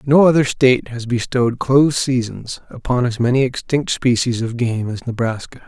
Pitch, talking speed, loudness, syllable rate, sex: 125 Hz, 170 wpm, -17 LUFS, 5.1 syllables/s, male